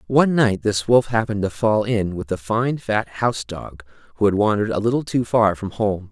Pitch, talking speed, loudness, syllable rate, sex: 105 Hz, 225 wpm, -20 LUFS, 5.4 syllables/s, male